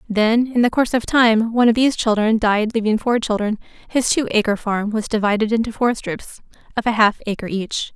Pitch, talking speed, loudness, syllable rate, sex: 225 Hz, 210 wpm, -18 LUFS, 5.5 syllables/s, female